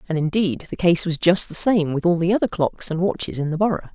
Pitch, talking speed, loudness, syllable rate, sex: 175 Hz, 275 wpm, -20 LUFS, 6.1 syllables/s, female